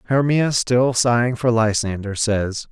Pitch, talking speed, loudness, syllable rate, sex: 120 Hz, 130 wpm, -19 LUFS, 4.0 syllables/s, male